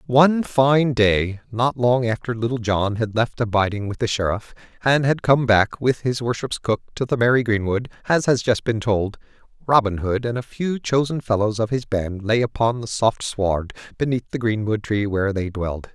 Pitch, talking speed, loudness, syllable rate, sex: 115 Hz, 200 wpm, -21 LUFS, 4.9 syllables/s, male